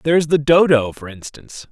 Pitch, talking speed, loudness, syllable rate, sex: 140 Hz, 210 wpm, -15 LUFS, 6.0 syllables/s, male